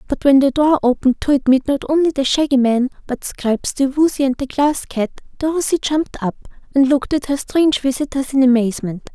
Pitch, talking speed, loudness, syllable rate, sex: 270 Hz, 205 wpm, -17 LUFS, 5.8 syllables/s, female